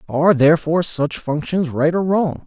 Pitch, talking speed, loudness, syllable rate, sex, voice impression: 160 Hz, 170 wpm, -17 LUFS, 5.3 syllables/s, male, masculine, adult-like, thick, tensed, powerful, slightly bright, clear, slightly nasal, cool, slightly mature, friendly, reassuring, wild, lively, slightly kind